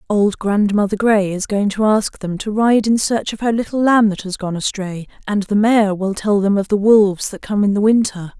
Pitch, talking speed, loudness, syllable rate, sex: 205 Hz, 245 wpm, -16 LUFS, 5.0 syllables/s, female